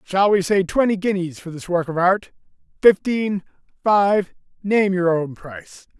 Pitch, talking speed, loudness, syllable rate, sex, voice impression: 185 Hz, 150 wpm, -19 LUFS, 4.4 syllables/s, male, masculine, slightly old, slightly thick, muffled, sincere, slightly friendly, reassuring